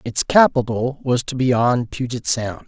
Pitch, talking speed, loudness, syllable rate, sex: 125 Hz, 180 wpm, -19 LUFS, 4.4 syllables/s, male